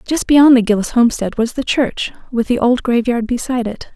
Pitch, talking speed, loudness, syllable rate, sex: 240 Hz, 210 wpm, -15 LUFS, 5.6 syllables/s, female